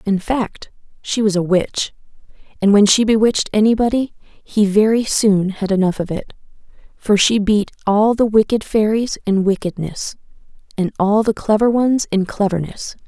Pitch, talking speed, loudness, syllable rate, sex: 210 Hz, 155 wpm, -17 LUFS, 4.7 syllables/s, female